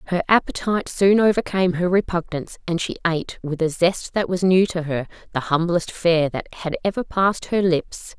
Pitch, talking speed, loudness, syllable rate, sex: 175 Hz, 190 wpm, -21 LUFS, 5.4 syllables/s, female